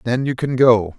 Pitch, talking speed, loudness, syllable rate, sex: 125 Hz, 245 wpm, -16 LUFS, 4.6 syllables/s, male